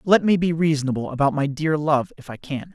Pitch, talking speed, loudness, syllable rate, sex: 150 Hz, 240 wpm, -21 LUFS, 5.8 syllables/s, male